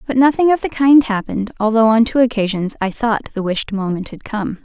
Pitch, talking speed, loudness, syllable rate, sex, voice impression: 225 Hz, 220 wpm, -16 LUFS, 5.6 syllables/s, female, very feminine, slightly young, very thin, slightly relaxed, slightly weak, slightly dark, soft, very clear, very fluent, slightly halting, very cute, very intellectual, refreshing, sincere, very calm, very friendly, very reassuring, very unique, elegant, slightly wild, very sweet, lively, kind, modest, slightly light